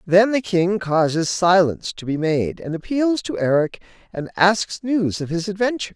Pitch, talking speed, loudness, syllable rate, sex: 190 Hz, 180 wpm, -20 LUFS, 4.8 syllables/s, female